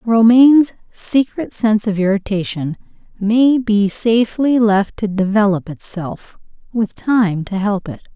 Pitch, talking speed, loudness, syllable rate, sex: 210 Hz, 125 wpm, -16 LUFS, 4.1 syllables/s, female